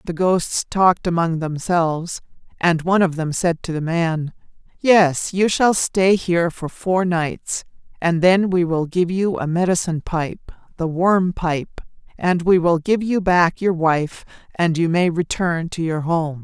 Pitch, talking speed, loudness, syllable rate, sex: 170 Hz, 170 wpm, -19 LUFS, 4.1 syllables/s, female